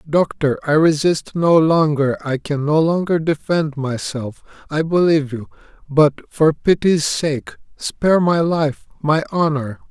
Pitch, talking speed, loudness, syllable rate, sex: 155 Hz, 125 wpm, -18 LUFS, 4.1 syllables/s, male